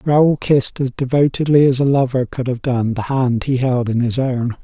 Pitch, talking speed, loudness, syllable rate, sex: 130 Hz, 220 wpm, -17 LUFS, 4.9 syllables/s, male